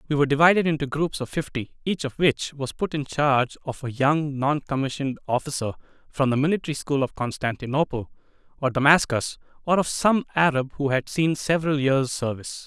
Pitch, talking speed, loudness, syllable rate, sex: 140 Hz, 175 wpm, -24 LUFS, 5.7 syllables/s, male